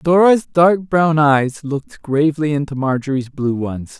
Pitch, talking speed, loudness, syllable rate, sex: 150 Hz, 150 wpm, -16 LUFS, 4.4 syllables/s, male